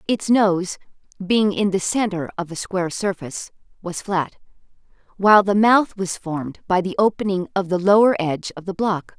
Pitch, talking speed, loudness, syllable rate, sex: 195 Hz, 175 wpm, -20 LUFS, 5.1 syllables/s, female